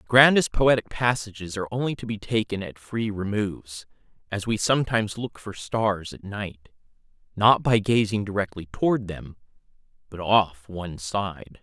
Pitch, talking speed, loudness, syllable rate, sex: 105 Hz, 150 wpm, -24 LUFS, 4.8 syllables/s, male